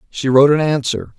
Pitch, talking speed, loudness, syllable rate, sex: 140 Hz, 200 wpm, -15 LUFS, 6.1 syllables/s, male